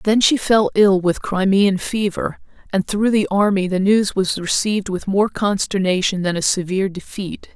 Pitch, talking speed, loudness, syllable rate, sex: 195 Hz, 175 wpm, -18 LUFS, 4.7 syllables/s, female